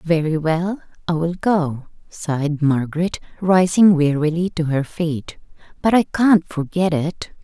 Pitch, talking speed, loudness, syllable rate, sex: 165 Hz, 135 wpm, -19 LUFS, 4.1 syllables/s, female